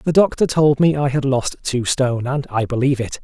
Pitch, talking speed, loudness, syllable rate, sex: 135 Hz, 240 wpm, -18 LUFS, 5.5 syllables/s, male